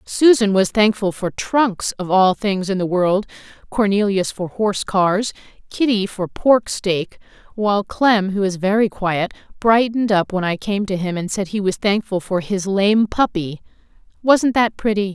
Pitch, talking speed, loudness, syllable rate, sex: 200 Hz, 175 wpm, -18 LUFS, 4.4 syllables/s, female